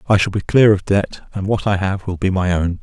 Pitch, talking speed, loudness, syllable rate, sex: 100 Hz, 300 wpm, -17 LUFS, 5.4 syllables/s, male